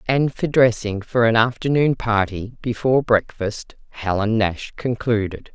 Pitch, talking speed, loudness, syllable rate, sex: 115 Hz, 130 wpm, -20 LUFS, 4.3 syllables/s, female